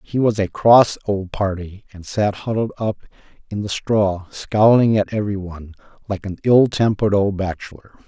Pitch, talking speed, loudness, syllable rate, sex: 100 Hz, 170 wpm, -18 LUFS, 5.0 syllables/s, male